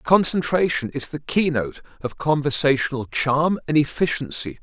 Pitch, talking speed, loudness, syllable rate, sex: 145 Hz, 115 wpm, -21 LUFS, 5.0 syllables/s, male